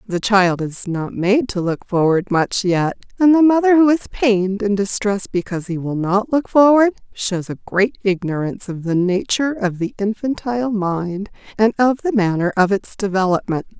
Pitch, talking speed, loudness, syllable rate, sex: 205 Hz, 185 wpm, -18 LUFS, 4.9 syllables/s, female